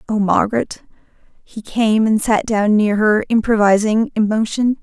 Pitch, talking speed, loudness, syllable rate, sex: 215 Hz, 135 wpm, -16 LUFS, 4.6 syllables/s, female